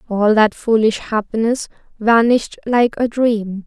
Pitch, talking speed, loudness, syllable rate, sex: 225 Hz, 130 wpm, -16 LUFS, 4.2 syllables/s, female